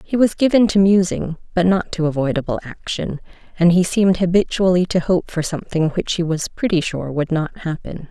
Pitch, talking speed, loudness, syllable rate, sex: 175 Hz, 195 wpm, -18 LUFS, 5.4 syllables/s, female